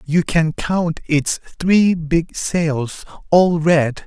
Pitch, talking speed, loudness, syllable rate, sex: 165 Hz, 120 wpm, -17 LUFS, 2.6 syllables/s, male